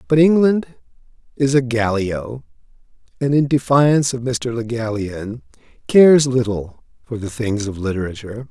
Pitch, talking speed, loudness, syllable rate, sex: 120 Hz, 135 wpm, -18 LUFS, 4.9 syllables/s, male